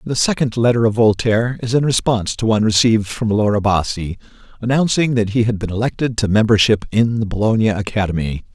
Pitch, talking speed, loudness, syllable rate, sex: 110 Hz, 185 wpm, -17 LUFS, 6.1 syllables/s, male